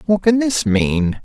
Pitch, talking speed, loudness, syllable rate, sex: 145 Hz, 195 wpm, -16 LUFS, 3.7 syllables/s, male